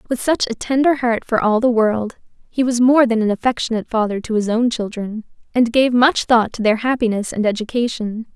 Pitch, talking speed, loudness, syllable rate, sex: 230 Hz, 210 wpm, -17 LUFS, 5.5 syllables/s, female